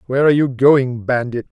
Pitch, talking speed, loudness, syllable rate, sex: 130 Hz, 190 wpm, -16 LUFS, 6.1 syllables/s, male